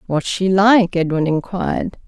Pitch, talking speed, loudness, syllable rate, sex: 185 Hz, 145 wpm, -17 LUFS, 4.3 syllables/s, female